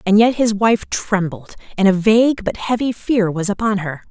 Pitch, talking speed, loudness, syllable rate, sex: 205 Hz, 205 wpm, -17 LUFS, 4.9 syllables/s, female